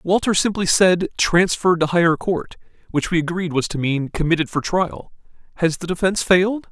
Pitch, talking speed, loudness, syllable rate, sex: 175 Hz, 180 wpm, -19 LUFS, 5.4 syllables/s, male